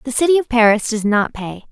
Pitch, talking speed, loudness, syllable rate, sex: 235 Hz, 245 wpm, -16 LUFS, 5.8 syllables/s, female